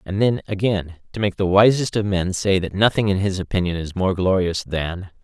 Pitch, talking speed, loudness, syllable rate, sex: 95 Hz, 220 wpm, -20 LUFS, 5.1 syllables/s, male